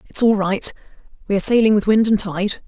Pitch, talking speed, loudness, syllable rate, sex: 205 Hz, 200 wpm, -17 LUFS, 6.3 syllables/s, female